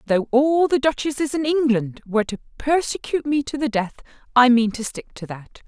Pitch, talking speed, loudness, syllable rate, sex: 260 Hz, 200 wpm, -20 LUFS, 5.5 syllables/s, female